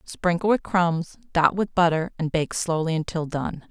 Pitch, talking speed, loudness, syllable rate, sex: 170 Hz, 180 wpm, -23 LUFS, 4.5 syllables/s, female